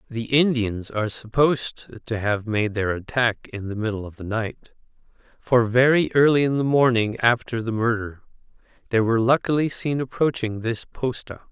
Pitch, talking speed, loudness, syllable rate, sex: 120 Hz, 160 wpm, -22 LUFS, 4.9 syllables/s, male